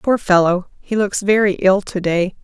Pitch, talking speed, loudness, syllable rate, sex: 195 Hz, 195 wpm, -16 LUFS, 4.4 syllables/s, female